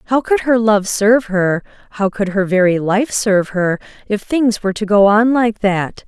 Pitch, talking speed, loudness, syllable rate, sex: 210 Hz, 200 wpm, -15 LUFS, 4.8 syllables/s, female